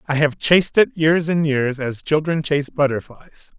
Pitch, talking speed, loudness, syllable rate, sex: 150 Hz, 185 wpm, -18 LUFS, 4.7 syllables/s, male